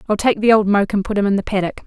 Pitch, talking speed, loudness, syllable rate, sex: 205 Hz, 355 wpm, -17 LUFS, 7.3 syllables/s, female